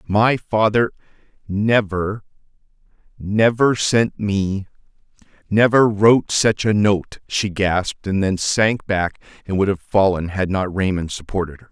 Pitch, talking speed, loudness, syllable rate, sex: 100 Hz, 120 wpm, -19 LUFS, 4.2 syllables/s, male